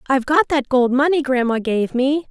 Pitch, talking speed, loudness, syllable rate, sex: 270 Hz, 210 wpm, -18 LUFS, 5.2 syllables/s, female